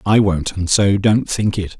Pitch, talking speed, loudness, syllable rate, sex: 100 Hz, 235 wpm, -16 LUFS, 4.2 syllables/s, male